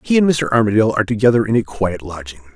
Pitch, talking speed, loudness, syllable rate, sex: 110 Hz, 235 wpm, -16 LUFS, 7.4 syllables/s, male